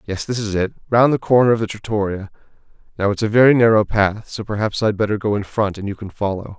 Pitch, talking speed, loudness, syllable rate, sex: 105 Hz, 265 wpm, -18 LUFS, 6.6 syllables/s, male